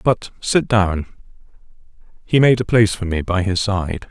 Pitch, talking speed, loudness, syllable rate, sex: 100 Hz, 175 wpm, -18 LUFS, 4.7 syllables/s, male